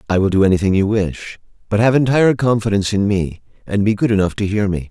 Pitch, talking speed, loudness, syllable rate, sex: 105 Hz, 235 wpm, -16 LUFS, 6.4 syllables/s, male